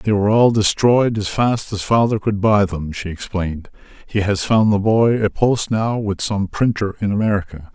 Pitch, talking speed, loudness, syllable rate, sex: 105 Hz, 200 wpm, -18 LUFS, 4.8 syllables/s, male